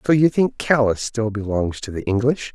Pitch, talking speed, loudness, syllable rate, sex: 120 Hz, 215 wpm, -20 LUFS, 5.1 syllables/s, male